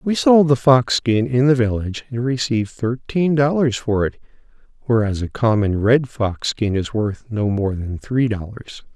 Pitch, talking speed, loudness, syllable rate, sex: 120 Hz, 180 wpm, -19 LUFS, 4.5 syllables/s, male